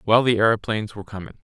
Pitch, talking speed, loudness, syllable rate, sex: 110 Hz, 200 wpm, -21 LUFS, 8.5 syllables/s, male